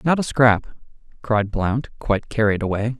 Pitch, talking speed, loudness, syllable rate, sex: 115 Hz, 160 wpm, -20 LUFS, 4.9 syllables/s, male